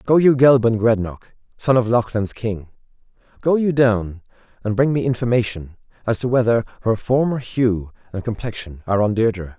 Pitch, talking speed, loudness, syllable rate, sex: 115 Hz, 165 wpm, -19 LUFS, 5.2 syllables/s, male